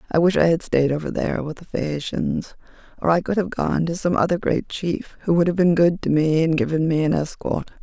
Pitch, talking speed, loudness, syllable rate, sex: 165 Hz, 245 wpm, -21 LUFS, 5.5 syllables/s, female